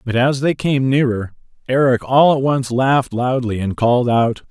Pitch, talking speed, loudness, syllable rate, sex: 125 Hz, 185 wpm, -16 LUFS, 4.7 syllables/s, male